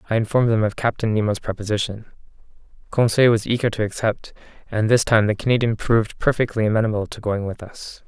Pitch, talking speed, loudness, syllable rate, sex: 110 Hz, 180 wpm, -20 LUFS, 6.2 syllables/s, male